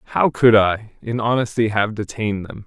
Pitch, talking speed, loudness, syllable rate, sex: 110 Hz, 180 wpm, -19 LUFS, 5.2 syllables/s, male